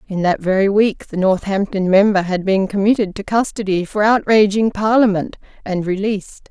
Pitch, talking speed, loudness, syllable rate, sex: 200 Hz, 155 wpm, -16 LUFS, 5.1 syllables/s, female